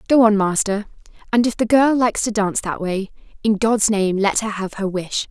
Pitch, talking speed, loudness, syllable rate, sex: 210 Hz, 225 wpm, -19 LUFS, 5.2 syllables/s, female